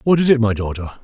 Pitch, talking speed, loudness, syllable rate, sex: 120 Hz, 290 wpm, -17 LUFS, 6.5 syllables/s, male